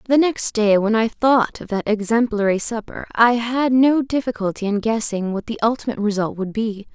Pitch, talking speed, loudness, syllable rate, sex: 225 Hz, 190 wpm, -19 LUFS, 5.1 syllables/s, female